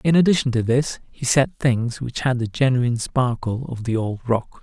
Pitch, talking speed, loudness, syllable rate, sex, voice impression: 125 Hz, 210 wpm, -21 LUFS, 4.7 syllables/s, male, very masculine, adult-like, slightly thick, relaxed, weak, slightly dark, very soft, muffled, slightly halting, slightly raspy, cool, intellectual, slightly refreshing, very sincere, very calm, slightly friendly, slightly reassuring, very unique, elegant, slightly wild, very sweet, very kind, very modest